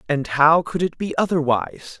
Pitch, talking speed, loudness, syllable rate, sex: 155 Hz, 180 wpm, -19 LUFS, 5.0 syllables/s, male